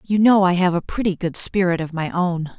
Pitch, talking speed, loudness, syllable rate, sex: 180 Hz, 255 wpm, -19 LUFS, 5.2 syllables/s, female